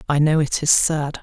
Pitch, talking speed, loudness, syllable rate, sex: 150 Hz, 245 wpm, -18 LUFS, 4.8 syllables/s, male